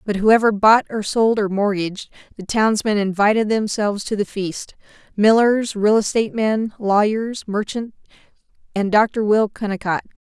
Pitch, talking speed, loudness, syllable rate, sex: 210 Hz, 130 wpm, -18 LUFS, 4.7 syllables/s, female